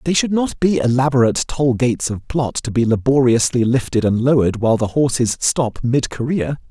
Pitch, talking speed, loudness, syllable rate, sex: 125 Hz, 190 wpm, -17 LUFS, 5.4 syllables/s, male